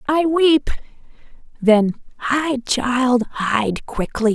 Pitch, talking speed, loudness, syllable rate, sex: 255 Hz, 95 wpm, -18 LUFS, 3.0 syllables/s, female